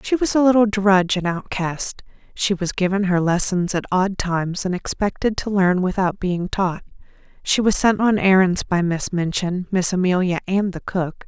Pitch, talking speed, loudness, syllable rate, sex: 190 Hz, 185 wpm, -20 LUFS, 4.7 syllables/s, female